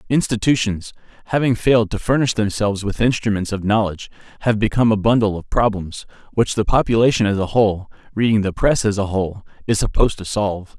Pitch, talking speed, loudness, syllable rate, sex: 105 Hz, 180 wpm, -19 LUFS, 6.2 syllables/s, male